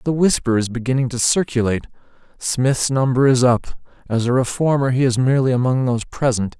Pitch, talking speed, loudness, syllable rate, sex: 125 Hz, 165 wpm, -18 LUFS, 5.9 syllables/s, male